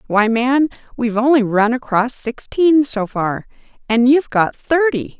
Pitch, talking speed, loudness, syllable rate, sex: 245 Hz, 150 wpm, -16 LUFS, 4.4 syllables/s, female